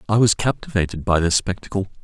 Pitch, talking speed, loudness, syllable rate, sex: 95 Hz, 175 wpm, -20 LUFS, 6.3 syllables/s, male